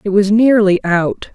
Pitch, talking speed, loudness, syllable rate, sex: 205 Hz, 180 wpm, -13 LUFS, 4.1 syllables/s, female